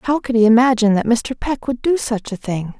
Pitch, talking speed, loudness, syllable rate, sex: 235 Hz, 260 wpm, -17 LUFS, 5.5 syllables/s, female